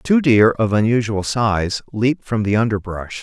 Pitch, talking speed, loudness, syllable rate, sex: 110 Hz, 165 wpm, -18 LUFS, 4.5 syllables/s, male